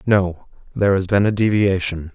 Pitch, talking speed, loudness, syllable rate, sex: 95 Hz, 170 wpm, -18 LUFS, 5.1 syllables/s, male